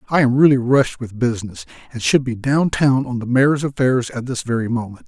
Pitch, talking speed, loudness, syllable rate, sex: 125 Hz, 225 wpm, -18 LUFS, 5.4 syllables/s, male